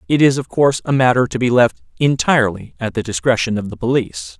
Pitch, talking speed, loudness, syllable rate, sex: 120 Hz, 220 wpm, -16 LUFS, 6.3 syllables/s, male